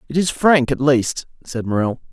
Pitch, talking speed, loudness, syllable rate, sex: 135 Hz, 200 wpm, -18 LUFS, 4.7 syllables/s, male